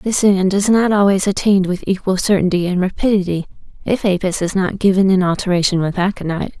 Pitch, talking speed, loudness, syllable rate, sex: 190 Hz, 180 wpm, -16 LUFS, 6.1 syllables/s, female